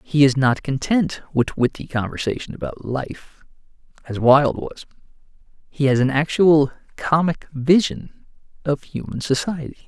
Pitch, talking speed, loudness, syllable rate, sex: 145 Hz, 130 wpm, -20 LUFS, 4.6 syllables/s, male